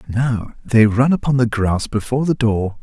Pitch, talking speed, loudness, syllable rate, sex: 115 Hz, 190 wpm, -17 LUFS, 4.7 syllables/s, male